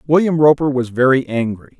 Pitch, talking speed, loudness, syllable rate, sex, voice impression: 135 Hz, 165 wpm, -15 LUFS, 5.5 syllables/s, male, masculine, adult-like, cool, intellectual, slightly sincere, slightly elegant